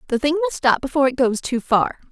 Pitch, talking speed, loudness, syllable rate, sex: 255 Hz, 255 wpm, -19 LUFS, 6.7 syllables/s, female